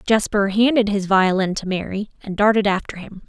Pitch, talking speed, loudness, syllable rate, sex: 200 Hz, 185 wpm, -19 LUFS, 5.3 syllables/s, female